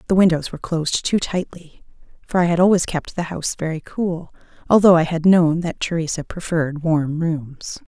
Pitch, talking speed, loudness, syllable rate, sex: 165 Hz, 180 wpm, -19 LUFS, 5.3 syllables/s, female